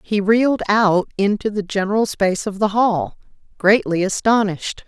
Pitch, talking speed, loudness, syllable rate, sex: 205 Hz, 150 wpm, -18 LUFS, 5.0 syllables/s, female